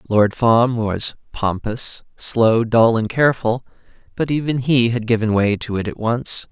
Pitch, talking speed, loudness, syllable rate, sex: 115 Hz, 165 wpm, -18 LUFS, 4.1 syllables/s, male